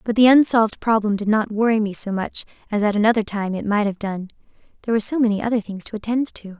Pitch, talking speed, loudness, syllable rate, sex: 215 Hz, 245 wpm, -20 LUFS, 6.6 syllables/s, female